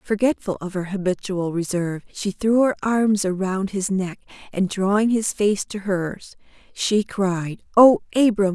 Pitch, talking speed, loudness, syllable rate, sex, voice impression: 200 Hz, 155 wpm, -21 LUFS, 4.2 syllables/s, female, feminine, adult-like, slightly soft, sincere, friendly, slightly kind